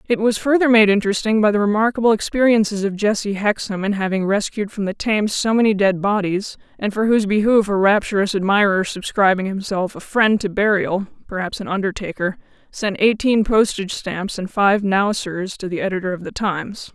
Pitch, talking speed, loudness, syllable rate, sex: 205 Hz, 185 wpm, -18 LUFS, 5.3 syllables/s, female